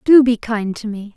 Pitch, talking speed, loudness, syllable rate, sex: 225 Hz, 260 wpm, -17 LUFS, 4.8 syllables/s, female